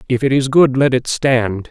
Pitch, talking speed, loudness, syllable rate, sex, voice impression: 130 Hz, 245 wpm, -15 LUFS, 4.6 syllables/s, male, masculine, middle-aged, tensed, powerful, slightly hard, clear, slightly halting, calm, mature, wild, slightly lively, slightly strict